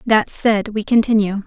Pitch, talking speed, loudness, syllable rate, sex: 215 Hz, 165 wpm, -16 LUFS, 4.4 syllables/s, female